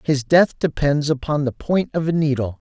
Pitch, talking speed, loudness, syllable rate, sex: 145 Hz, 200 wpm, -19 LUFS, 4.8 syllables/s, male